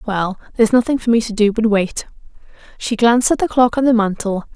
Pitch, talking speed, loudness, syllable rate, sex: 225 Hz, 225 wpm, -16 LUFS, 6.1 syllables/s, female